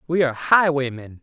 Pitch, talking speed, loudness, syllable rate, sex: 145 Hz, 145 wpm, -19 LUFS, 5.6 syllables/s, male